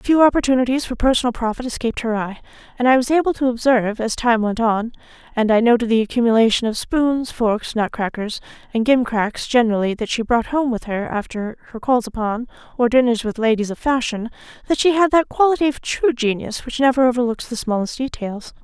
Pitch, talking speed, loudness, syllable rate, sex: 240 Hz, 195 wpm, -19 LUFS, 5.8 syllables/s, female